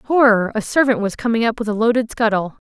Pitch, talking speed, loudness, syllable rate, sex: 225 Hz, 225 wpm, -17 LUFS, 5.9 syllables/s, female